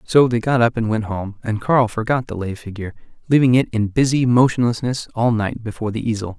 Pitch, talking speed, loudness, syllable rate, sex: 115 Hz, 215 wpm, -19 LUFS, 5.8 syllables/s, male